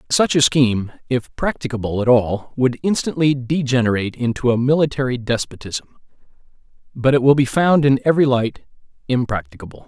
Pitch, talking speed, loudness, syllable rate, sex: 130 Hz, 140 wpm, -18 LUFS, 5.6 syllables/s, male